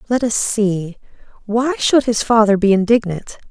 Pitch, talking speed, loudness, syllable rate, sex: 215 Hz, 155 wpm, -16 LUFS, 4.4 syllables/s, female